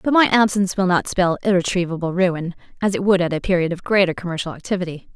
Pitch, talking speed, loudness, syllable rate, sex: 180 Hz, 210 wpm, -19 LUFS, 6.6 syllables/s, female